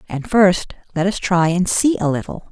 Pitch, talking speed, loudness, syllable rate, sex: 185 Hz, 215 wpm, -17 LUFS, 4.7 syllables/s, female